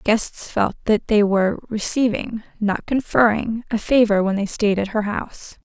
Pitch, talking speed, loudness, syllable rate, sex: 215 Hz, 170 wpm, -20 LUFS, 4.5 syllables/s, female